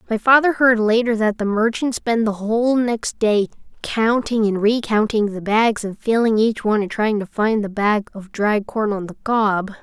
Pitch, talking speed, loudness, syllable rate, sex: 220 Hz, 195 wpm, -19 LUFS, 4.5 syllables/s, female